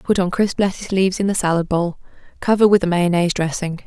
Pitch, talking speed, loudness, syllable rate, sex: 185 Hz, 215 wpm, -18 LUFS, 6.5 syllables/s, female